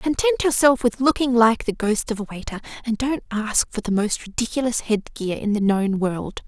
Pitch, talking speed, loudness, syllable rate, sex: 220 Hz, 215 wpm, -21 LUFS, 5.0 syllables/s, female